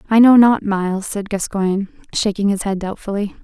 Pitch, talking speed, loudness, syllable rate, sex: 205 Hz, 175 wpm, -17 LUFS, 5.4 syllables/s, female